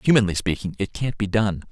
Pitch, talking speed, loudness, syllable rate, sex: 100 Hz, 210 wpm, -23 LUFS, 5.9 syllables/s, male